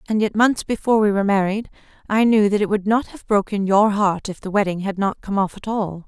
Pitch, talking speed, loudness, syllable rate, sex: 205 Hz, 255 wpm, -19 LUFS, 5.8 syllables/s, female